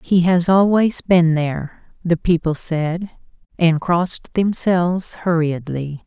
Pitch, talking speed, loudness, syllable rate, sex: 170 Hz, 120 wpm, -18 LUFS, 3.8 syllables/s, female